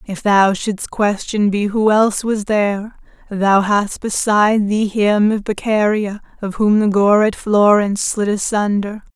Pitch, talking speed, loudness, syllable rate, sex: 205 Hz, 150 wpm, -16 LUFS, 4.3 syllables/s, female